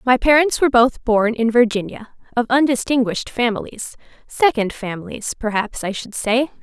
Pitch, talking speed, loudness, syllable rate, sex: 240 Hz, 135 wpm, -18 LUFS, 5.1 syllables/s, female